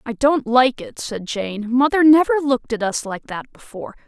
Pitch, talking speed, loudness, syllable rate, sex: 250 Hz, 205 wpm, -18 LUFS, 5.1 syllables/s, female